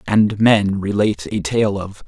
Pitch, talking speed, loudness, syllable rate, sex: 105 Hz, 175 wpm, -17 LUFS, 4.2 syllables/s, male